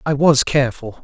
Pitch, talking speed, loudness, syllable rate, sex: 135 Hz, 175 wpm, -16 LUFS, 5.6 syllables/s, male